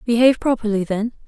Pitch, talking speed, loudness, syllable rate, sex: 225 Hz, 140 wpm, -19 LUFS, 6.8 syllables/s, female